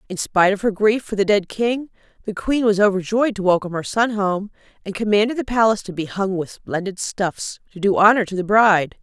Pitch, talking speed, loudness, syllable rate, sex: 205 Hz, 225 wpm, -19 LUFS, 5.7 syllables/s, female